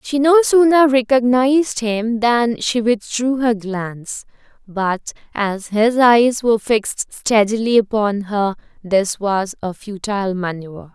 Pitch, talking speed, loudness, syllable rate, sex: 225 Hz, 130 wpm, -17 LUFS, 4.0 syllables/s, female